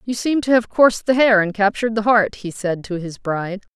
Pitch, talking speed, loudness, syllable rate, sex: 210 Hz, 255 wpm, -18 LUFS, 5.6 syllables/s, female